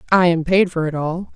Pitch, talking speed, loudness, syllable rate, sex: 170 Hz, 265 wpm, -18 LUFS, 5.4 syllables/s, female